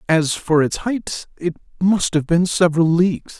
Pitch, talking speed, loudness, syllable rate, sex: 170 Hz, 175 wpm, -18 LUFS, 4.5 syllables/s, male